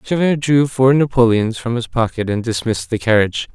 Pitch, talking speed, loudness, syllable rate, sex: 120 Hz, 185 wpm, -16 LUFS, 5.6 syllables/s, male